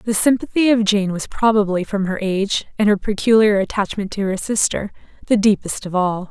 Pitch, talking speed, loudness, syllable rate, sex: 205 Hz, 190 wpm, -18 LUFS, 5.4 syllables/s, female